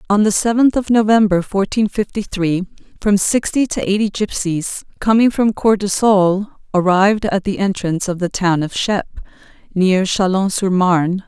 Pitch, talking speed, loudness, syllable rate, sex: 195 Hz, 155 wpm, -16 LUFS, 5.0 syllables/s, female